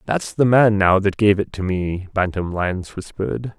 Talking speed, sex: 200 wpm, male